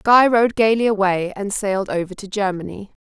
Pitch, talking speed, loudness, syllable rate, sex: 205 Hz, 175 wpm, -19 LUFS, 5.3 syllables/s, female